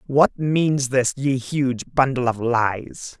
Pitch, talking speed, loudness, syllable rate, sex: 130 Hz, 150 wpm, -21 LUFS, 3.0 syllables/s, male